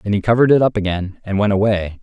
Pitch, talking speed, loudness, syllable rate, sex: 105 Hz, 265 wpm, -16 LUFS, 6.8 syllables/s, male